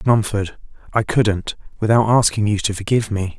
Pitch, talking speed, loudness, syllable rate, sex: 105 Hz, 125 wpm, -18 LUFS, 5.2 syllables/s, male